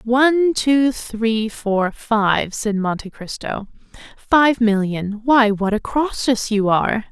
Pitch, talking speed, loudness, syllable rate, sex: 225 Hz, 125 wpm, -18 LUFS, 3.4 syllables/s, female